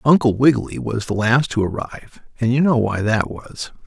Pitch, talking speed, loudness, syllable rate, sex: 120 Hz, 200 wpm, -19 LUFS, 5.1 syllables/s, male